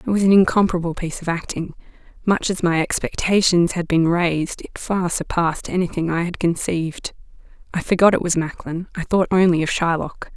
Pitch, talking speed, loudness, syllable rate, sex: 175 Hz, 180 wpm, -20 LUFS, 5.7 syllables/s, female